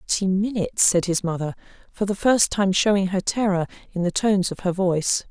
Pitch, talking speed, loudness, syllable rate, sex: 190 Hz, 205 wpm, -22 LUFS, 6.0 syllables/s, female